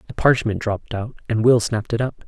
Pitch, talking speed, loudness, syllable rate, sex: 115 Hz, 235 wpm, -20 LUFS, 6.2 syllables/s, male